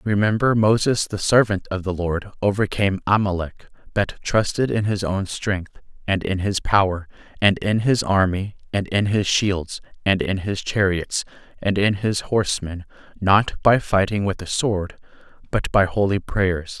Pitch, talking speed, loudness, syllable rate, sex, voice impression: 100 Hz, 160 wpm, -21 LUFS, 4.5 syllables/s, male, very masculine, very adult-like, very middle-aged, very thick, very tensed, very powerful, slightly dark, hard, muffled, fluent, cool, very intellectual, refreshing, very sincere, very calm, mature, very friendly, very reassuring, unique, elegant, slightly wild, sweet, slightly lively, kind, slightly modest